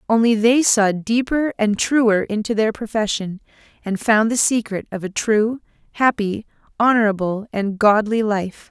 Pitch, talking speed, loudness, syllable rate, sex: 220 Hz, 145 wpm, -18 LUFS, 4.4 syllables/s, female